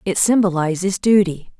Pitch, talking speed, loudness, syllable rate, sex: 190 Hz, 115 wpm, -17 LUFS, 4.9 syllables/s, female